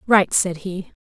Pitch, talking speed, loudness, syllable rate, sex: 185 Hz, 175 wpm, -19 LUFS, 4.9 syllables/s, female